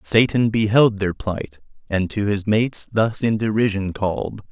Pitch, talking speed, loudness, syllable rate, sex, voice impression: 105 Hz, 160 wpm, -20 LUFS, 4.3 syllables/s, male, very masculine, very adult-like, middle-aged, very thick, slightly tensed, powerful, slightly bright, slightly soft, muffled, fluent, slightly raspy, very cool, very intellectual, slightly refreshing, sincere, calm, very mature, very friendly, very reassuring, very unique, very elegant, slightly wild, very sweet, slightly lively, very kind, slightly modest